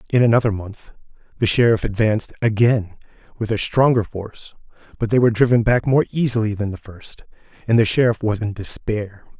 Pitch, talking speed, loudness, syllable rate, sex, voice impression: 110 Hz, 175 wpm, -19 LUFS, 5.7 syllables/s, male, masculine, adult-like, slightly thick, tensed, powerful, bright, muffled, cool, intellectual, calm, slightly reassuring, wild, slightly modest